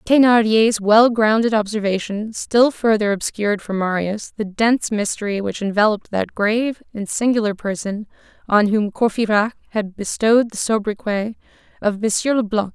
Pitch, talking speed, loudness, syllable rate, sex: 215 Hz, 135 wpm, -19 LUFS, 5.0 syllables/s, female